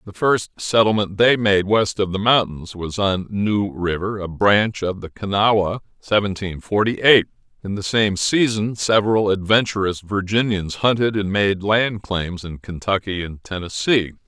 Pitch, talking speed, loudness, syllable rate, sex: 100 Hz, 155 wpm, -19 LUFS, 4.2 syllables/s, male